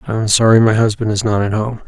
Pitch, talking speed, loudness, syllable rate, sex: 110 Hz, 290 wpm, -14 LUFS, 6.5 syllables/s, male